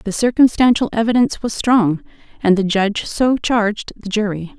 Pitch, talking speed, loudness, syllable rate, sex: 215 Hz, 155 wpm, -17 LUFS, 5.1 syllables/s, female